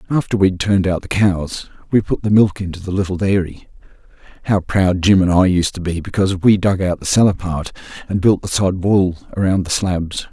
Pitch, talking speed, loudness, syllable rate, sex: 95 Hz, 215 wpm, -17 LUFS, 5.3 syllables/s, male